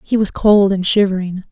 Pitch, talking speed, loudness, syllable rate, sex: 195 Hz, 200 wpm, -15 LUFS, 5.2 syllables/s, female